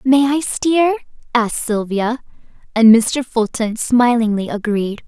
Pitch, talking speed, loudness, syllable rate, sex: 240 Hz, 120 wpm, -16 LUFS, 3.9 syllables/s, female